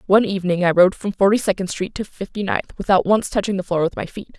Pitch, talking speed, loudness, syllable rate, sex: 195 Hz, 260 wpm, -19 LUFS, 6.6 syllables/s, female